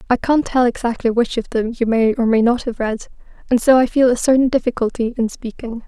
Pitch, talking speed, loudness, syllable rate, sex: 240 Hz, 235 wpm, -17 LUFS, 5.8 syllables/s, female